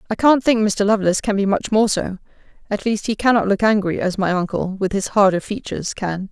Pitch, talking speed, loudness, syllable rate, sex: 205 Hz, 230 wpm, -19 LUFS, 5.9 syllables/s, female